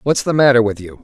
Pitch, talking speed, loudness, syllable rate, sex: 120 Hz, 290 wpm, -14 LUFS, 6.5 syllables/s, male